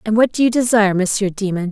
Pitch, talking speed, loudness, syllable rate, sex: 210 Hz, 245 wpm, -16 LUFS, 6.8 syllables/s, female